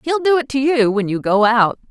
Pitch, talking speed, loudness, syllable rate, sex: 250 Hz, 285 wpm, -16 LUFS, 5.2 syllables/s, female